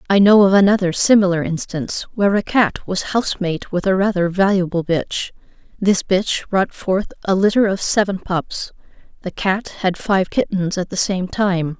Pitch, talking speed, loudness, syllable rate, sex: 190 Hz, 180 wpm, -18 LUFS, 4.7 syllables/s, female